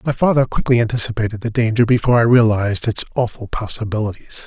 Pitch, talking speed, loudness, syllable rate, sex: 115 Hz, 160 wpm, -17 LUFS, 6.6 syllables/s, male